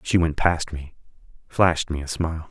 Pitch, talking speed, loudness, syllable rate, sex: 80 Hz, 190 wpm, -23 LUFS, 5.4 syllables/s, male